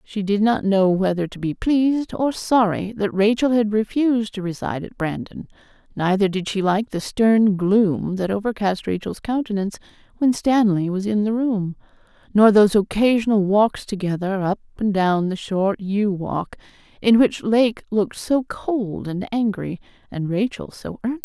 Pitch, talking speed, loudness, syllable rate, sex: 205 Hz, 165 wpm, -20 LUFS, 4.6 syllables/s, female